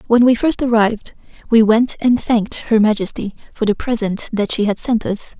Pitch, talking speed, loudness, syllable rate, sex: 225 Hz, 200 wpm, -16 LUFS, 5.1 syllables/s, female